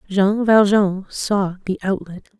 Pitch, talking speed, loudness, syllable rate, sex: 195 Hz, 125 wpm, -18 LUFS, 3.6 syllables/s, female